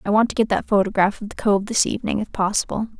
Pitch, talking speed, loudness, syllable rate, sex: 210 Hz, 260 wpm, -21 LUFS, 6.7 syllables/s, female